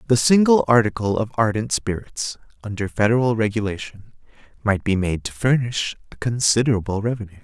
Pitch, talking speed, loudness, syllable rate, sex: 110 Hz, 135 wpm, -20 LUFS, 5.6 syllables/s, male